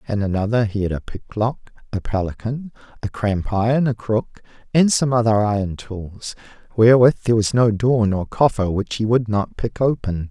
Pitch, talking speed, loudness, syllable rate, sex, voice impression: 110 Hz, 175 wpm, -19 LUFS, 5.1 syllables/s, male, masculine, adult-like, tensed, weak, halting, sincere, calm, friendly, reassuring, kind, modest